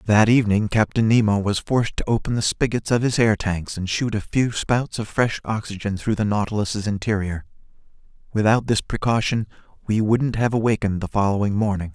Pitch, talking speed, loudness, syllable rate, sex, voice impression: 105 Hz, 180 wpm, -21 LUFS, 5.6 syllables/s, male, masculine, adult-like, bright, clear, fluent, cool, intellectual, refreshing, sincere, kind, light